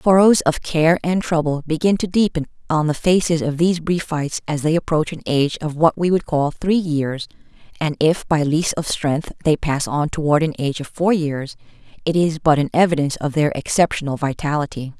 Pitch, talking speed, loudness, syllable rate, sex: 155 Hz, 200 wpm, -19 LUFS, 5.4 syllables/s, female